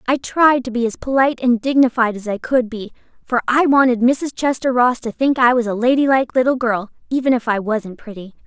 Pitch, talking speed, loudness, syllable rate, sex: 245 Hz, 220 wpm, -17 LUFS, 5.7 syllables/s, female